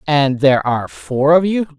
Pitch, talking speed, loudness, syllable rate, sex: 145 Hz, 200 wpm, -15 LUFS, 4.9 syllables/s, female